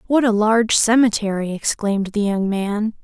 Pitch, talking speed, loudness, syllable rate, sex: 210 Hz, 160 wpm, -18 LUFS, 5.0 syllables/s, female